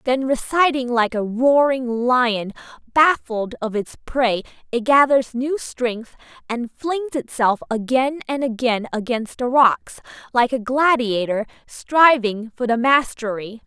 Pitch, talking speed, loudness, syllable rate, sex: 245 Hz, 130 wpm, -19 LUFS, 3.7 syllables/s, female